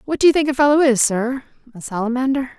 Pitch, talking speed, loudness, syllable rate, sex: 260 Hz, 210 wpm, -17 LUFS, 6.5 syllables/s, female